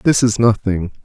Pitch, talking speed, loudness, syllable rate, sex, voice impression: 110 Hz, 175 wpm, -16 LUFS, 4.8 syllables/s, male, very masculine, adult-like, thick, slightly fluent, cool, slightly calm, sweet, slightly kind